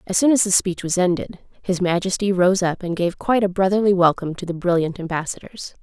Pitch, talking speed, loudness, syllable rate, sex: 185 Hz, 215 wpm, -20 LUFS, 6.0 syllables/s, female